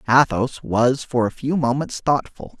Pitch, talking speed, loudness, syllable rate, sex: 130 Hz, 160 wpm, -20 LUFS, 4.3 syllables/s, male